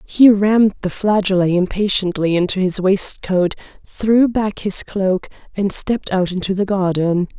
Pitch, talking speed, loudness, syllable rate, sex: 195 Hz, 145 wpm, -17 LUFS, 4.4 syllables/s, female